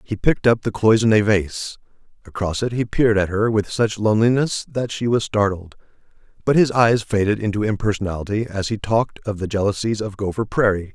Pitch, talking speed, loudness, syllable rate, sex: 105 Hz, 185 wpm, -20 LUFS, 5.7 syllables/s, male